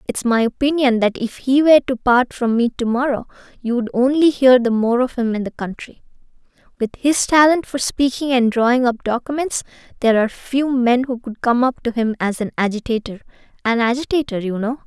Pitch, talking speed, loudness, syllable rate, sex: 245 Hz, 195 wpm, -18 LUFS, 5.4 syllables/s, female